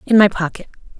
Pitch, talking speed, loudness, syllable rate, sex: 190 Hz, 180 wpm, -16 LUFS, 7.0 syllables/s, female